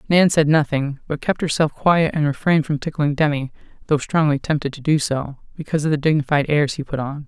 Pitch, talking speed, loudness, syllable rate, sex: 150 Hz, 215 wpm, -19 LUFS, 5.9 syllables/s, female